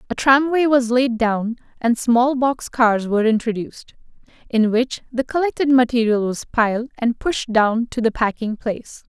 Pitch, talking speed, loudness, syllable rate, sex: 240 Hz, 165 wpm, -19 LUFS, 4.7 syllables/s, female